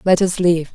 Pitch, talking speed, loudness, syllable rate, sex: 175 Hz, 240 wpm, -16 LUFS, 4.8 syllables/s, female